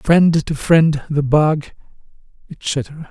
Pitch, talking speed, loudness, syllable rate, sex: 155 Hz, 115 wpm, -16 LUFS, 2.6 syllables/s, male